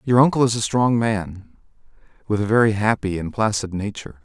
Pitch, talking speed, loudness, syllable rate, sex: 105 Hz, 185 wpm, -20 LUFS, 5.6 syllables/s, male